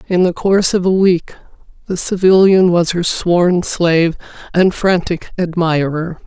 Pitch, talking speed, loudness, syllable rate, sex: 175 Hz, 145 wpm, -14 LUFS, 4.3 syllables/s, female